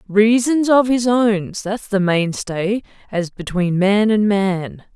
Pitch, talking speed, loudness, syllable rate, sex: 205 Hz, 145 wpm, -17 LUFS, 3.5 syllables/s, female